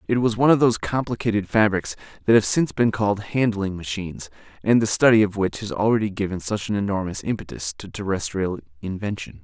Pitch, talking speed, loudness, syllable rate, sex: 100 Hz, 185 wpm, -22 LUFS, 6.2 syllables/s, male